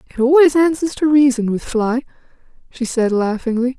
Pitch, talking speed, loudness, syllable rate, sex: 255 Hz, 160 wpm, -16 LUFS, 5.1 syllables/s, female